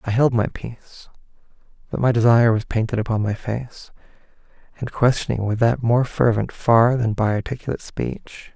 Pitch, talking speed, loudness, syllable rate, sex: 115 Hz, 160 wpm, -20 LUFS, 5.2 syllables/s, male